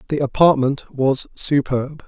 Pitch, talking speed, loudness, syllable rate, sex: 140 Hz, 115 wpm, -18 LUFS, 3.9 syllables/s, male